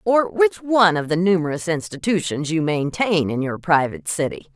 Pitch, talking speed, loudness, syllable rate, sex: 175 Hz, 170 wpm, -20 LUFS, 5.2 syllables/s, female